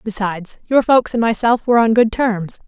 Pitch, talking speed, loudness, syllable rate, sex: 225 Hz, 200 wpm, -16 LUFS, 5.2 syllables/s, female